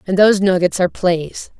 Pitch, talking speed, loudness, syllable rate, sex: 185 Hz, 190 wpm, -15 LUFS, 5.7 syllables/s, female